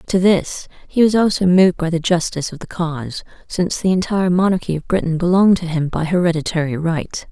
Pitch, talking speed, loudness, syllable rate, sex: 175 Hz, 195 wpm, -17 LUFS, 6.1 syllables/s, female